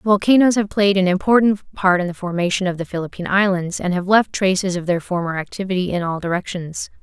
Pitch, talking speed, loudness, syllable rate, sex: 185 Hz, 205 wpm, -19 LUFS, 6.0 syllables/s, female